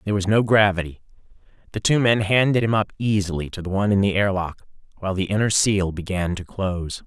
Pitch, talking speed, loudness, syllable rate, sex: 100 Hz, 205 wpm, -21 LUFS, 6.2 syllables/s, male